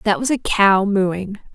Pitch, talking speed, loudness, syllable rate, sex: 200 Hz, 195 wpm, -17 LUFS, 3.6 syllables/s, female